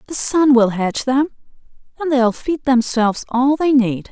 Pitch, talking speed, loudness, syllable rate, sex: 260 Hz, 190 wpm, -16 LUFS, 4.7 syllables/s, female